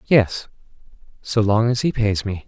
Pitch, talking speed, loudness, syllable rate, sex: 110 Hz, 170 wpm, -20 LUFS, 4.3 syllables/s, male